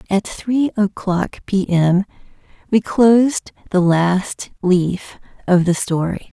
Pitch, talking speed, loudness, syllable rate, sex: 195 Hz, 120 wpm, -17 LUFS, 3.3 syllables/s, female